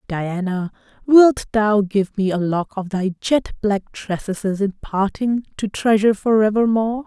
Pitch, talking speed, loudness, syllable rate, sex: 210 Hz, 145 wpm, -19 LUFS, 4.2 syllables/s, female